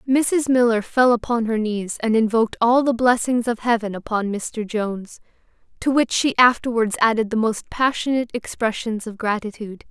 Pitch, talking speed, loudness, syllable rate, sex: 230 Hz, 165 wpm, -20 LUFS, 5.1 syllables/s, female